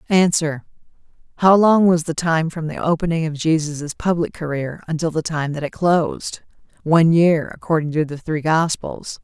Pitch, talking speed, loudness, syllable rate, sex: 160 Hz, 155 wpm, -19 LUFS, 4.9 syllables/s, female